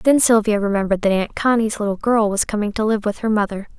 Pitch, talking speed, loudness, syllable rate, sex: 210 Hz, 240 wpm, -18 LUFS, 6.3 syllables/s, female